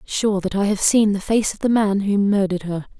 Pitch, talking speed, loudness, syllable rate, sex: 200 Hz, 260 wpm, -19 LUFS, 5.4 syllables/s, female